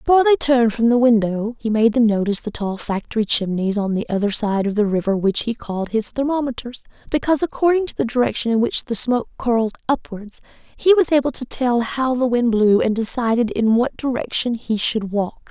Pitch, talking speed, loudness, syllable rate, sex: 235 Hz, 210 wpm, -19 LUFS, 5.8 syllables/s, female